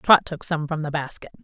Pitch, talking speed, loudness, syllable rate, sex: 155 Hz, 250 wpm, -23 LUFS, 5.4 syllables/s, female